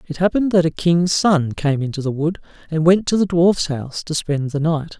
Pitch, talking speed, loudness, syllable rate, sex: 165 Hz, 240 wpm, -18 LUFS, 5.3 syllables/s, male